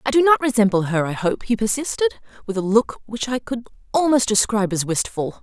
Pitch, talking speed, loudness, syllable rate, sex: 225 Hz, 210 wpm, -20 LUFS, 5.8 syllables/s, female